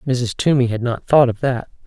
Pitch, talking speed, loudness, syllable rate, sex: 130 Hz, 225 wpm, -18 LUFS, 5.2 syllables/s, female